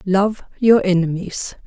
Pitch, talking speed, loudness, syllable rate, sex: 190 Hz, 110 wpm, -18 LUFS, 3.9 syllables/s, female